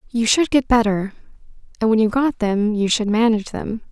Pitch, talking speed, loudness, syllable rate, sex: 225 Hz, 200 wpm, -18 LUFS, 5.6 syllables/s, female